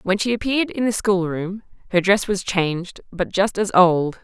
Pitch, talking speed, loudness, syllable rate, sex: 195 Hz, 200 wpm, -20 LUFS, 4.7 syllables/s, female